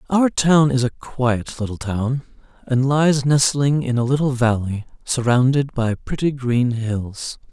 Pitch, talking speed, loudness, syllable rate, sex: 130 Hz, 150 wpm, -19 LUFS, 3.9 syllables/s, male